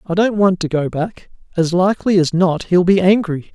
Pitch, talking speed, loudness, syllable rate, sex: 180 Hz, 220 wpm, -16 LUFS, 5.1 syllables/s, male